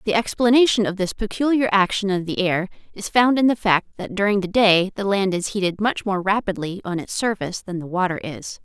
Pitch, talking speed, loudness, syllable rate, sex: 200 Hz, 220 wpm, -20 LUFS, 5.5 syllables/s, female